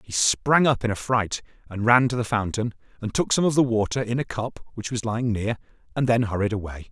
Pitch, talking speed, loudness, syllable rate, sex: 115 Hz, 245 wpm, -23 LUFS, 5.7 syllables/s, male